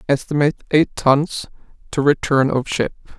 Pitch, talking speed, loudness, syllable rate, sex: 145 Hz, 130 wpm, -18 LUFS, 4.9 syllables/s, male